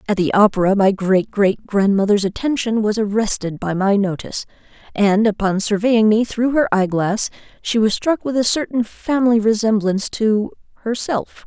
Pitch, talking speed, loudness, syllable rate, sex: 210 Hz, 160 wpm, -18 LUFS, 4.9 syllables/s, female